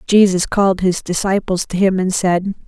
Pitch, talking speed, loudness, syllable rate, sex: 190 Hz, 180 wpm, -16 LUFS, 4.9 syllables/s, female